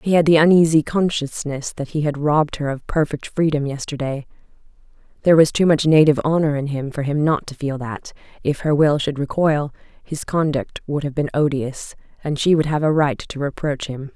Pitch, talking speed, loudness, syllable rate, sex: 150 Hz, 205 wpm, -19 LUFS, 5.4 syllables/s, female